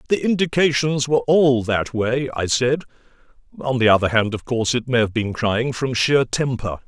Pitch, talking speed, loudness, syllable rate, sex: 125 Hz, 190 wpm, -19 LUFS, 5.0 syllables/s, male